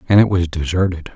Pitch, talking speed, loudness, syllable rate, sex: 90 Hz, 210 wpm, -17 LUFS, 6.2 syllables/s, male